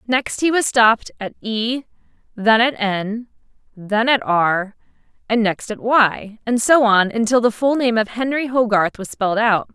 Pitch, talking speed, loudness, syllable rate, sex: 225 Hz, 180 wpm, -18 LUFS, 4.2 syllables/s, female